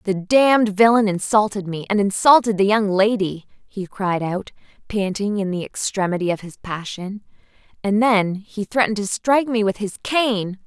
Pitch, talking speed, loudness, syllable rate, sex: 205 Hz, 170 wpm, -19 LUFS, 4.7 syllables/s, female